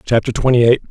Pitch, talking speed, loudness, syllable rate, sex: 120 Hz, 200 wpm, -14 LUFS, 7.0 syllables/s, male